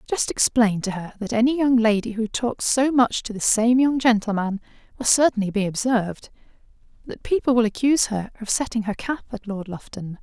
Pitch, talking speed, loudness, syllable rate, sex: 225 Hz, 190 wpm, -21 LUFS, 5.4 syllables/s, female